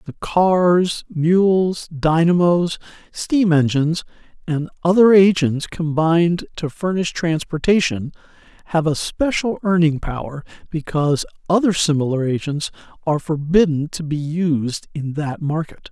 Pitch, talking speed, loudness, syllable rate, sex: 165 Hz, 115 wpm, -18 LUFS, 4.2 syllables/s, male